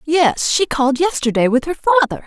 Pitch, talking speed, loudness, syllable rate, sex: 305 Hz, 185 wpm, -16 LUFS, 6.2 syllables/s, female